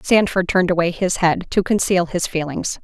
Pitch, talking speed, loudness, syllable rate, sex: 180 Hz, 190 wpm, -18 LUFS, 5.2 syllables/s, female